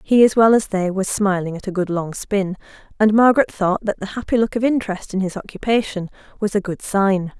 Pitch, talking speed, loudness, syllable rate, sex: 200 Hz, 225 wpm, -19 LUFS, 5.7 syllables/s, female